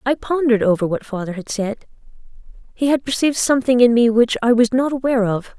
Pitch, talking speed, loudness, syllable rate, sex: 240 Hz, 205 wpm, -17 LUFS, 6.4 syllables/s, female